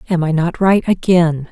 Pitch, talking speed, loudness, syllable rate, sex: 170 Hz, 200 wpm, -14 LUFS, 4.6 syllables/s, female